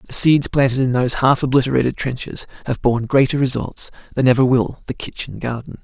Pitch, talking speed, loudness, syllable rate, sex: 130 Hz, 185 wpm, -18 LUFS, 5.9 syllables/s, male